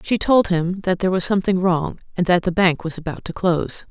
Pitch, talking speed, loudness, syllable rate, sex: 180 Hz, 245 wpm, -20 LUFS, 5.8 syllables/s, female